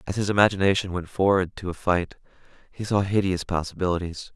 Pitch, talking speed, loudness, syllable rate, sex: 95 Hz, 165 wpm, -24 LUFS, 6.0 syllables/s, male